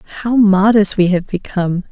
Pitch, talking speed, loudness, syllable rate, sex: 200 Hz, 155 wpm, -14 LUFS, 5.8 syllables/s, female